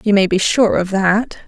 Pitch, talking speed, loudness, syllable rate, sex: 200 Hz, 245 wpm, -15 LUFS, 4.6 syllables/s, female